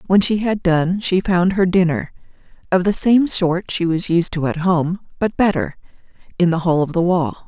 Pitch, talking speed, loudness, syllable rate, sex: 180 Hz, 195 wpm, -18 LUFS, 4.8 syllables/s, female